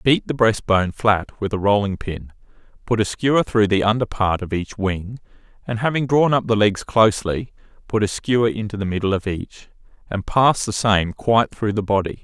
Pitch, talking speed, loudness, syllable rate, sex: 105 Hz, 205 wpm, -20 LUFS, 5.1 syllables/s, male